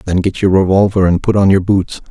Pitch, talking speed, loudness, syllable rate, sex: 95 Hz, 255 wpm, -12 LUFS, 5.8 syllables/s, male